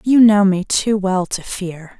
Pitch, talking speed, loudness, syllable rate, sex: 195 Hz, 210 wpm, -16 LUFS, 3.7 syllables/s, female